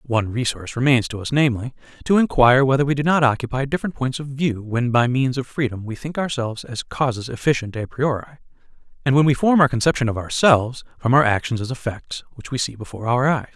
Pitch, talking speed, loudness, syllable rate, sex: 130 Hz, 215 wpm, -20 LUFS, 6.3 syllables/s, male